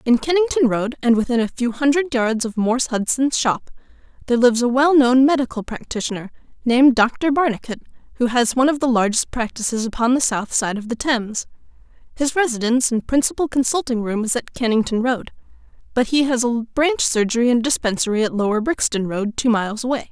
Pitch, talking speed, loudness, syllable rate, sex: 245 Hz, 180 wpm, -19 LUFS, 5.9 syllables/s, female